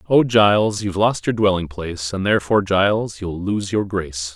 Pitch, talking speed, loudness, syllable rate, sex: 100 Hz, 195 wpm, -19 LUFS, 5.5 syllables/s, male